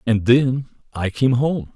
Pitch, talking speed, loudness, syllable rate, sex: 120 Hz, 170 wpm, -19 LUFS, 3.8 syllables/s, male